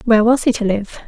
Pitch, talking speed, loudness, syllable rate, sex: 225 Hz, 280 wpm, -16 LUFS, 6.8 syllables/s, female